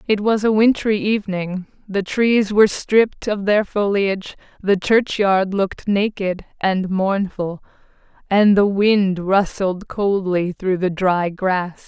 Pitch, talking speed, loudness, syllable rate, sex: 195 Hz, 135 wpm, -18 LUFS, 3.8 syllables/s, female